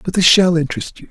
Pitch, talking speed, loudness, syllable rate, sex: 165 Hz, 270 wpm, -14 LUFS, 6.9 syllables/s, male